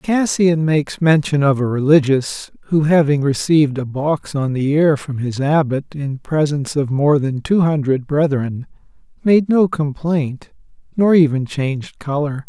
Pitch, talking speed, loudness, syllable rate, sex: 150 Hz, 155 wpm, -17 LUFS, 4.4 syllables/s, male